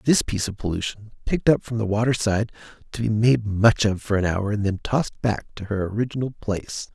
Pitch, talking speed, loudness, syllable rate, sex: 110 Hz, 225 wpm, -23 LUFS, 5.9 syllables/s, male